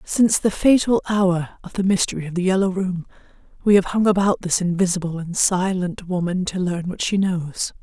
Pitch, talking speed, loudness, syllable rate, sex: 185 Hz, 190 wpm, -20 LUFS, 5.2 syllables/s, female